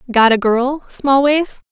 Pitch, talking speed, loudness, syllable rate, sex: 260 Hz, 140 wpm, -15 LUFS, 3.9 syllables/s, female